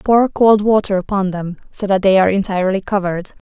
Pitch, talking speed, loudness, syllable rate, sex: 195 Hz, 190 wpm, -15 LUFS, 6.1 syllables/s, female